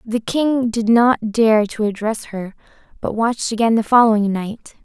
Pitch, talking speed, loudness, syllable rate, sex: 225 Hz, 175 wpm, -17 LUFS, 4.5 syllables/s, female